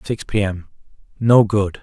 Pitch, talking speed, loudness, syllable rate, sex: 105 Hz, 130 wpm, -18 LUFS, 4.3 syllables/s, male